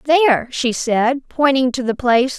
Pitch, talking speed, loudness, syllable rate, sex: 255 Hz, 175 wpm, -17 LUFS, 4.4 syllables/s, female